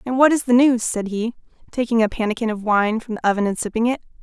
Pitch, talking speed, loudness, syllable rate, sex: 230 Hz, 255 wpm, -20 LUFS, 6.6 syllables/s, female